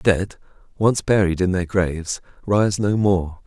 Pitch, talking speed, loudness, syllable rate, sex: 95 Hz, 175 wpm, -20 LUFS, 4.2 syllables/s, male